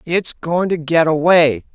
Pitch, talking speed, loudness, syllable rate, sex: 160 Hz, 170 wpm, -15 LUFS, 4.0 syllables/s, male